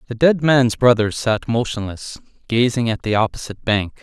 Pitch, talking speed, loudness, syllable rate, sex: 115 Hz, 165 wpm, -18 LUFS, 5.0 syllables/s, male